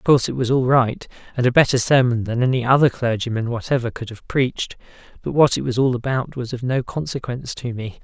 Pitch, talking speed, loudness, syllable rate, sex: 125 Hz, 225 wpm, -20 LUFS, 6.1 syllables/s, male